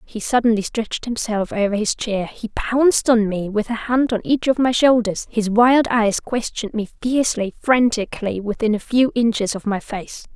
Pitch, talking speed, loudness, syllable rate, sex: 225 Hz, 190 wpm, -19 LUFS, 5.0 syllables/s, female